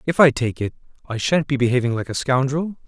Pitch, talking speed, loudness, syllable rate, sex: 135 Hz, 230 wpm, -20 LUFS, 5.9 syllables/s, male